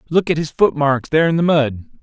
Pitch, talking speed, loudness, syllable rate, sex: 150 Hz, 265 wpm, -17 LUFS, 6.2 syllables/s, male